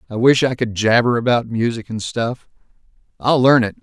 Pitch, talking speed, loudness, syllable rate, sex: 120 Hz, 190 wpm, -17 LUFS, 5.2 syllables/s, male